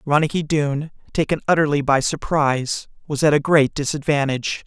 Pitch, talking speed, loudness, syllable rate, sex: 145 Hz, 140 wpm, -20 LUFS, 5.6 syllables/s, male